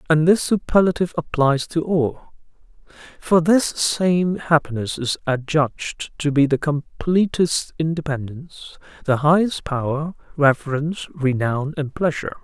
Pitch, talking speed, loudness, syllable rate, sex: 155 Hz, 115 wpm, -20 LUFS, 4.5 syllables/s, male